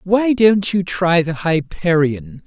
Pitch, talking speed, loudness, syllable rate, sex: 175 Hz, 145 wpm, -16 LUFS, 3.4 syllables/s, male